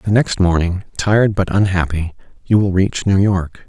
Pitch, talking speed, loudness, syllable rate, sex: 95 Hz, 180 wpm, -16 LUFS, 4.8 syllables/s, male